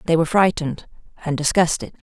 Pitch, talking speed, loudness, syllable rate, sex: 165 Hz, 140 wpm, -20 LUFS, 7.0 syllables/s, female